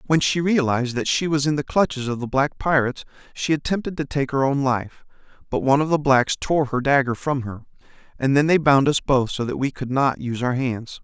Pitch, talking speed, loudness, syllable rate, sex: 140 Hz, 240 wpm, -21 LUFS, 5.6 syllables/s, male